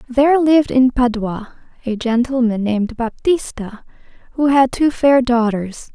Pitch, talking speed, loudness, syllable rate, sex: 245 Hz, 130 wpm, -16 LUFS, 4.4 syllables/s, female